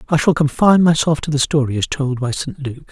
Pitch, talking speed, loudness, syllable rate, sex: 150 Hz, 245 wpm, -16 LUFS, 5.9 syllables/s, male